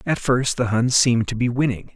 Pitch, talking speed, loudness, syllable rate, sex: 120 Hz, 245 wpm, -20 LUFS, 5.5 syllables/s, male